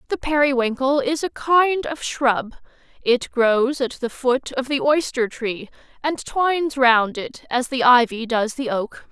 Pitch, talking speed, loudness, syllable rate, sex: 260 Hz, 170 wpm, -20 LUFS, 4.0 syllables/s, female